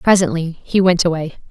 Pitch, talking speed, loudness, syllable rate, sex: 175 Hz, 160 wpm, -17 LUFS, 5.5 syllables/s, female